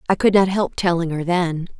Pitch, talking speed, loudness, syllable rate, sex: 175 Hz, 235 wpm, -19 LUFS, 5.3 syllables/s, female